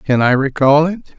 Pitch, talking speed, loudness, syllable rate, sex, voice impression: 145 Hz, 205 wpm, -14 LUFS, 4.8 syllables/s, male, masculine, slightly old, slightly powerful, slightly hard, muffled, halting, mature, wild, strict, slightly intense